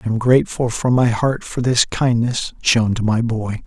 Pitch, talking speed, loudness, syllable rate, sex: 120 Hz, 215 wpm, -18 LUFS, 4.6 syllables/s, male